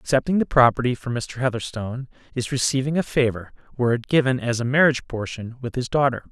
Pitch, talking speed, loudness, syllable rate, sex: 125 Hz, 190 wpm, -22 LUFS, 6.3 syllables/s, male